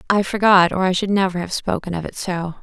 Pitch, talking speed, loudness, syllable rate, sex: 185 Hz, 250 wpm, -19 LUFS, 5.8 syllables/s, female